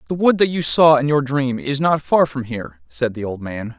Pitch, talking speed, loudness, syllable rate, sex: 140 Hz, 270 wpm, -18 LUFS, 5.1 syllables/s, male